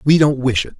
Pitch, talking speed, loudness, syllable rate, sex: 135 Hz, 300 wpm, -16 LUFS, 5.8 syllables/s, male